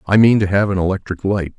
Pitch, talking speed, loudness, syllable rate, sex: 100 Hz, 265 wpm, -16 LUFS, 6.2 syllables/s, male